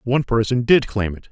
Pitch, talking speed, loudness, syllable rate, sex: 120 Hz, 230 wpm, -19 LUFS, 5.8 syllables/s, male